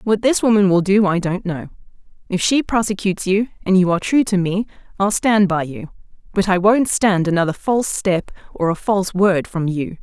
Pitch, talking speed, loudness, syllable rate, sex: 195 Hz, 210 wpm, -18 LUFS, 5.4 syllables/s, female